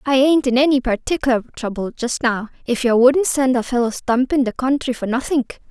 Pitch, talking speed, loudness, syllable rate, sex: 255 Hz, 190 wpm, -18 LUFS, 5.1 syllables/s, female